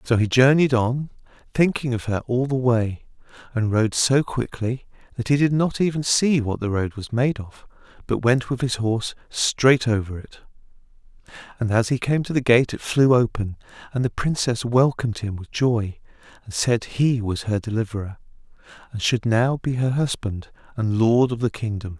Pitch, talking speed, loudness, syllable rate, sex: 120 Hz, 185 wpm, -22 LUFS, 4.8 syllables/s, male